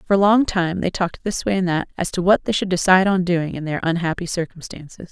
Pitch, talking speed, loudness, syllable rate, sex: 180 Hz, 260 wpm, -20 LUFS, 6.2 syllables/s, female